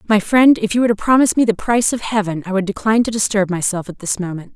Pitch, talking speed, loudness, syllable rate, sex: 210 Hz, 275 wpm, -16 LUFS, 7.2 syllables/s, female